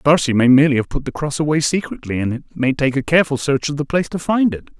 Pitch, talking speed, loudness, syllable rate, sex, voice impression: 145 Hz, 290 wpm, -17 LUFS, 7.0 syllables/s, male, very masculine, very adult-like, slightly old, very thick, very tensed, very powerful, slightly bright, soft, slightly muffled, fluent, slightly raspy, very cool, very intellectual, very sincere, very calm, very mature, friendly, very reassuring, very unique, elegant, wild, sweet, lively, very kind, modest